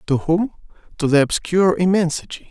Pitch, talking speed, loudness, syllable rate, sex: 170 Hz, 145 wpm, -18 LUFS, 5.6 syllables/s, male